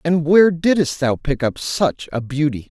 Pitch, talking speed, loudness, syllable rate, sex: 150 Hz, 195 wpm, -18 LUFS, 4.3 syllables/s, male